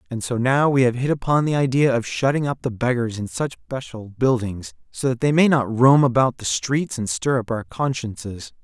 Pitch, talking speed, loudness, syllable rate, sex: 125 Hz, 220 wpm, -21 LUFS, 5.1 syllables/s, male